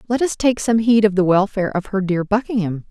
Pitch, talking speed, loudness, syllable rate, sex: 205 Hz, 250 wpm, -18 LUFS, 5.9 syllables/s, female